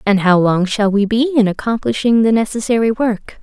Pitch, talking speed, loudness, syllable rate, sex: 215 Hz, 190 wpm, -15 LUFS, 5.3 syllables/s, female